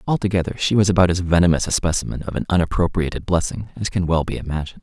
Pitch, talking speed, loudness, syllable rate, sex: 90 Hz, 210 wpm, -20 LUFS, 7.2 syllables/s, male